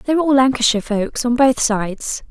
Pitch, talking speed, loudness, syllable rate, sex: 245 Hz, 210 wpm, -17 LUFS, 5.8 syllables/s, female